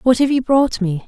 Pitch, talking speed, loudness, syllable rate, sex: 240 Hz, 280 wpm, -16 LUFS, 5.2 syllables/s, female